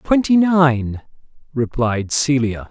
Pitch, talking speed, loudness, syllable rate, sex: 140 Hz, 90 wpm, -17 LUFS, 3.3 syllables/s, male